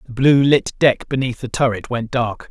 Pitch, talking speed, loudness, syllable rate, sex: 125 Hz, 215 wpm, -18 LUFS, 4.8 syllables/s, male